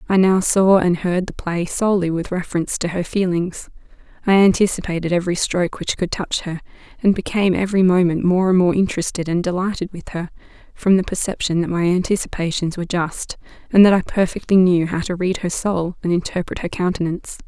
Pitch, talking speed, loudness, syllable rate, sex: 180 Hz, 190 wpm, -19 LUFS, 6.0 syllables/s, female